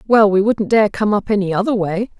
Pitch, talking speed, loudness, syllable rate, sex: 205 Hz, 245 wpm, -16 LUFS, 5.5 syllables/s, female